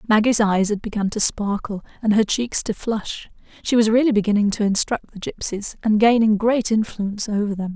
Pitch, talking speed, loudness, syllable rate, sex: 215 Hz, 185 wpm, -20 LUFS, 5.3 syllables/s, female